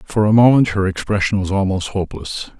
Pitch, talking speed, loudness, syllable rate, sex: 100 Hz, 185 wpm, -17 LUFS, 5.7 syllables/s, male